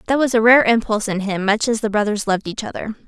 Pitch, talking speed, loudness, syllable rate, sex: 215 Hz, 275 wpm, -17 LUFS, 7.0 syllables/s, female